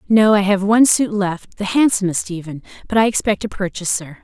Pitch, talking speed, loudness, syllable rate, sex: 200 Hz, 200 wpm, -17 LUFS, 5.5 syllables/s, female